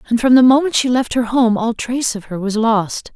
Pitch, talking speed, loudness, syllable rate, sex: 235 Hz, 265 wpm, -15 LUFS, 5.4 syllables/s, female